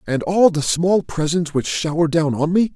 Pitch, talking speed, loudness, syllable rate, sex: 165 Hz, 220 wpm, -18 LUFS, 5.0 syllables/s, male